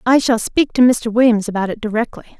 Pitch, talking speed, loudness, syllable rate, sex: 230 Hz, 225 wpm, -16 LUFS, 6.1 syllables/s, female